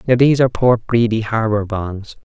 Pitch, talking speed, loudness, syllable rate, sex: 115 Hz, 185 wpm, -16 LUFS, 5.5 syllables/s, male